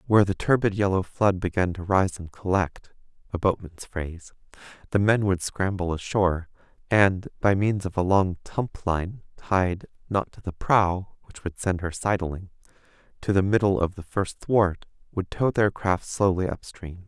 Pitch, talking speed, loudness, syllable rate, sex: 95 Hz, 160 wpm, -25 LUFS, 4.5 syllables/s, male